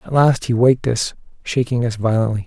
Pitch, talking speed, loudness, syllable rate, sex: 120 Hz, 195 wpm, -18 LUFS, 5.8 syllables/s, male